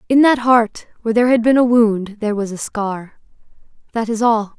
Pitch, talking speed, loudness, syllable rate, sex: 225 Hz, 210 wpm, -16 LUFS, 5.5 syllables/s, female